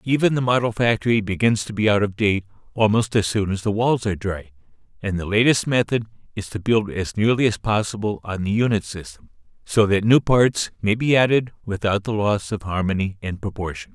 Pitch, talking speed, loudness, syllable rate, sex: 105 Hz, 200 wpm, -21 LUFS, 5.5 syllables/s, male